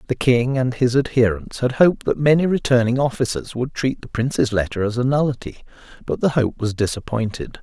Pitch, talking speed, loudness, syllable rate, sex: 125 Hz, 190 wpm, -20 LUFS, 5.6 syllables/s, male